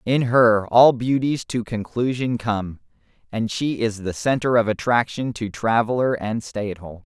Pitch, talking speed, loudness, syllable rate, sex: 115 Hz, 170 wpm, -21 LUFS, 4.4 syllables/s, male